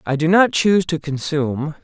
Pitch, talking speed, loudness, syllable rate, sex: 160 Hz, 195 wpm, -17 LUFS, 5.4 syllables/s, male